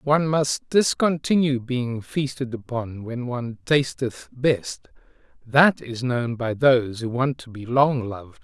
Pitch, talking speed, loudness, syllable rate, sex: 125 Hz, 150 wpm, -23 LUFS, 4.0 syllables/s, male